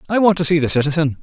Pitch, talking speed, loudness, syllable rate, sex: 160 Hz, 295 wpm, -16 LUFS, 7.8 syllables/s, male